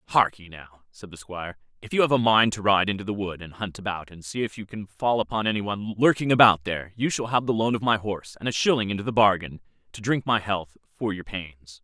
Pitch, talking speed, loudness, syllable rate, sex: 105 Hz, 260 wpm, -24 LUFS, 6.1 syllables/s, male